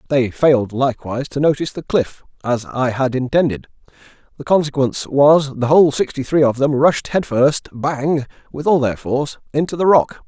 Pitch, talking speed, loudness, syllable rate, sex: 140 Hz, 180 wpm, -17 LUFS, 5.4 syllables/s, male